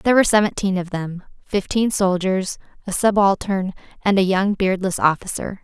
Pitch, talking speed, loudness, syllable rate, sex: 195 Hz, 150 wpm, -20 LUFS, 5.1 syllables/s, female